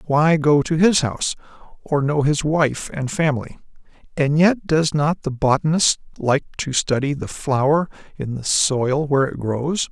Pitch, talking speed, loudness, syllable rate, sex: 145 Hz, 170 wpm, -19 LUFS, 4.3 syllables/s, male